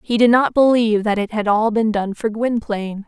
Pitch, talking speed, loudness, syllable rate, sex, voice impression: 220 Hz, 235 wpm, -17 LUFS, 5.4 syllables/s, female, feminine, adult-like, tensed, bright, slightly soft, clear, intellectual, calm, friendly, reassuring, elegant, lively, kind